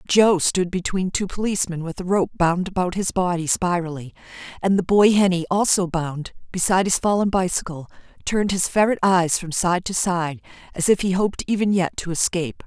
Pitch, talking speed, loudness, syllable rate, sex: 180 Hz, 185 wpm, -21 LUFS, 5.4 syllables/s, female